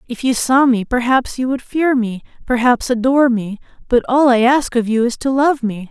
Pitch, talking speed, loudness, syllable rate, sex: 250 Hz, 225 wpm, -15 LUFS, 5.0 syllables/s, female